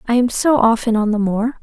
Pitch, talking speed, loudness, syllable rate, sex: 230 Hz, 260 wpm, -16 LUFS, 5.5 syllables/s, female